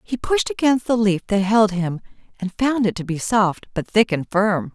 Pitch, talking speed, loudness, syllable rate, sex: 210 Hz, 230 wpm, -20 LUFS, 4.6 syllables/s, female